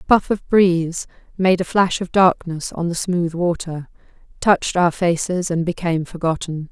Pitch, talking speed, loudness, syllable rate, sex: 175 Hz, 170 wpm, -19 LUFS, 4.8 syllables/s, female